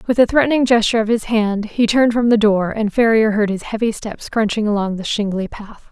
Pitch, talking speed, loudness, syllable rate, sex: 220 Hz, 235 wpm, -17 LUFS, 5.7 syllables/s, female